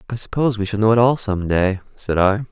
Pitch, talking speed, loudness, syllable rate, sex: 105 Hz, 260 wpm, -18 LUFS, 6.0 syllables/s, male